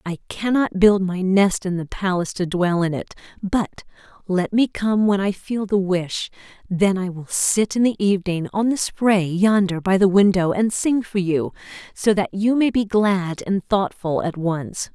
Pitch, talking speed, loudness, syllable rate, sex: 195 Hz, 195 wpm, -20 LUFS, 4.4 syllables/s, female